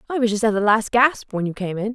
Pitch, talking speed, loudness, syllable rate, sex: 220 Hz, 340 wpm, -20 LUFS, 6.3 syllables/s, female